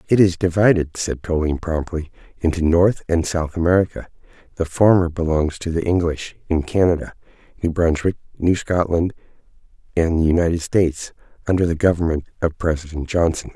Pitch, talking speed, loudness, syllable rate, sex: 85 Hz, 145 wpm, -20 LUFS, 5.6 syllables/s, male